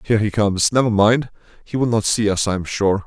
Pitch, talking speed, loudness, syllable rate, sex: 105 Hz, 255 wpm, -18 LUFS, 6.1 syllables/s, male